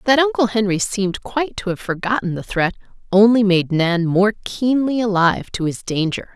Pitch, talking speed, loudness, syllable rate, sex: 205 Hz, 180 wpm, -18 LUFS, 5.2 syllables/s, female